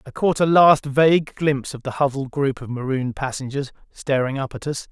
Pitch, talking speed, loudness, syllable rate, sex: 140 Hz, 210 wpm, -20 LUFS, 5.4 syllables/s, male